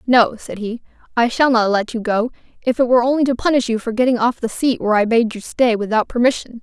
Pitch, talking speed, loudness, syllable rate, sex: 235 Hz, 255 wpm, -17 LUFS, 6.2 syllables/s, female